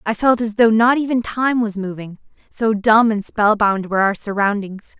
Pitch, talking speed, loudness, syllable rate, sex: 215 Hz, 205 wpm, -17 LUFS, 4.8 syllables/s, female